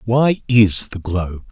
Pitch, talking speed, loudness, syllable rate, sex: 105 Hz, 160 wpm, -17 LUFS, 3.9 syllables/s, male